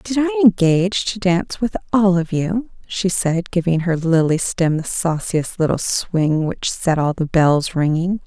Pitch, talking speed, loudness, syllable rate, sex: 180 Hz, 180 wpm, -18 LUFS, 4.1 syllables/s, female